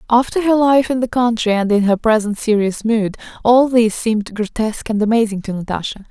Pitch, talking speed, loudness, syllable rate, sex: 225 Hz, 195 wpm, -16 LUFS, 5.6 syllables/s, female